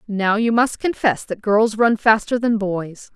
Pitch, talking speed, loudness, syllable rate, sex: 215 Hz, 190 wpm, -18 LUFS, 4.0 syllables/s, female